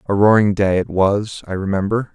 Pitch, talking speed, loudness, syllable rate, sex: 100 Hz, 195 wpm, -17 LUFS, 5.1 syllables/s, male